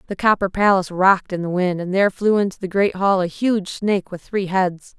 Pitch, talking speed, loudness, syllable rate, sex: 190 Hz, 240 wpm, -19 LUFS, 5.7 syllables/s, female